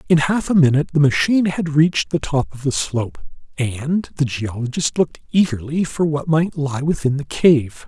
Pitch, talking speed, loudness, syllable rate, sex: 150 Hz, 190 wpm, -18 LUFS, 5.2 syllables/s, male